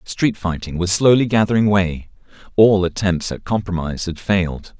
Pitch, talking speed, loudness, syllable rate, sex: 95 Hz, 150 wpm, -18 LUFS, 5.0 syllables/s, male